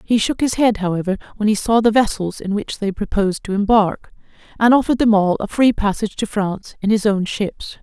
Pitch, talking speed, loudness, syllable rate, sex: 210 Hz, 220 wpm, -18 LUFS, 5.8 syllables/s, female